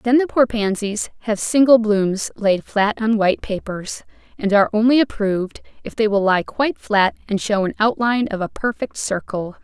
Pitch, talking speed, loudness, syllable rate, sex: 215 Hz, 185 wpm, -19 LUFS, 5.0 syllables/s, female